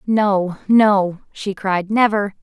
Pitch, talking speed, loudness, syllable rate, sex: 200 Hz, 125 wpm, -17 LUFS, 2.9 syllables/s, female